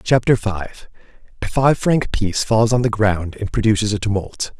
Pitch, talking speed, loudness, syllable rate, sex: 110 Hz, 170 wpm, -18 LUFS, 4.9 syllables/s, male